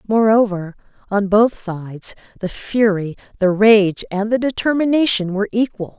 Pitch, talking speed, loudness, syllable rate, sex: 210 Hz, 130 wpm, -17 LUFS, 4.7 syllables/s, female